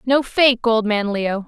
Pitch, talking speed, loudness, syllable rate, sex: 230 Hz, 205 wpm, -17 LUFS, 3.8 syllables/s, female